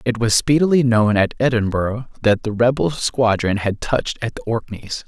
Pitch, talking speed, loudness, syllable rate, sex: 115 Hz, 175 wpm, -18 LUFS, 4.8 syllables/s, male